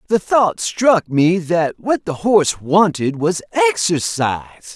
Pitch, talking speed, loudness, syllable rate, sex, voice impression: 180 Hz, 140 wpm, -16 LUFS, 4.0 syllables/s, male, very masculine, very adult-like, very middle-aged, very thick, very tensed, very powerful, very bright, soft, very clear, very fluent, raspy, very cool, intellectual, sincere, slightly calm, very mature, very friendly, very reassuring, very unique, slightly elegant, very wild, sweet, very lively, kind, very intense